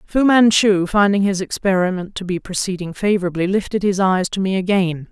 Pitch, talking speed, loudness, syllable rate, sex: 190 Hz, 175 wpm, -17 LUFS, 5.4 syllables/s, female